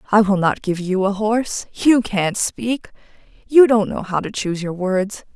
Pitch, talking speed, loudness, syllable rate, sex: 205 Hz, 200 wpm, -18 LUFS, 4.5 syllables/s, female